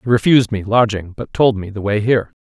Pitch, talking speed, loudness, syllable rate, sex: 110 Hz, 245 wpm, -16 LUFS, 6.3 syllables/s, male